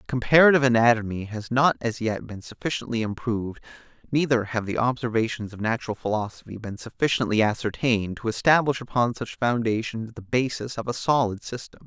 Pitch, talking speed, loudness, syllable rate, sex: 115 Hz, 150 wpm, -24 LUFS, 5.9 syllables/s, male